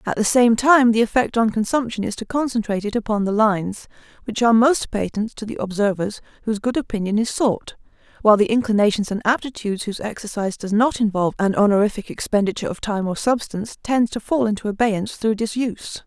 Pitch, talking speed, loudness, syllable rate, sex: 220 Hz, 190 wpm, -20 LUFS, 6.3 syllables/s, female